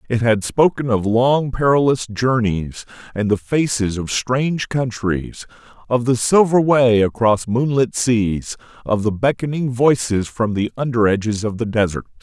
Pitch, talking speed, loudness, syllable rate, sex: 120 Hz, 150 wpm, -18 LUFS, 4.3 syllables/s, male